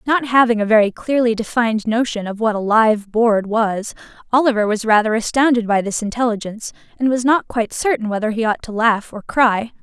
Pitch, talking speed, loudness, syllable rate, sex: 225 Hz, 195 wpm, -17 LUFS, 5.6 syllables/s, female